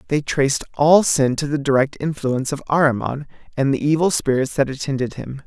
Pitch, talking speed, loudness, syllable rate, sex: 140 Hz, 185 wpm, -19 LUFS, 5.6 syllables/s, male